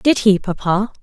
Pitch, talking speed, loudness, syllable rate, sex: 205 Hz, 175 wpm, -17 LUFS, 4.4 syllables/s, female